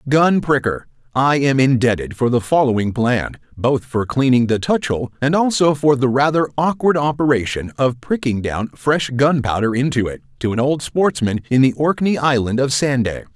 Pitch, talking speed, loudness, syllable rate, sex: 130 Hz, 165 wpm, -17 LUFS, 4.9 syllables/s, male